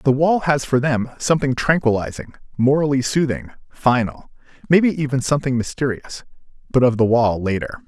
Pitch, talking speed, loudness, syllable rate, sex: 130 Hz, 135 wpm, -19 LUFS, 5.6 syllables/s, male